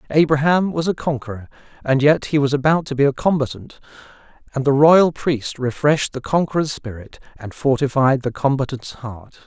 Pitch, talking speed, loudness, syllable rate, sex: 140 Hz, 165 wpm, -18 LUFS, 5.3 syllables/s, male